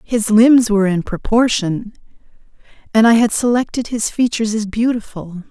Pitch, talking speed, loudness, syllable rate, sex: 220 Hz, 140 wpm, -15 LUFS, 5.0 syllables/s, female